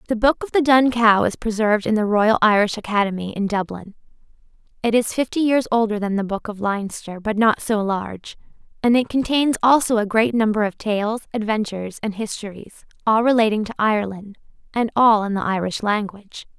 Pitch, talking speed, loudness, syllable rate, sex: 215 Hz, 185 wpm, -20 LUFS, 5.5 syllables/s, female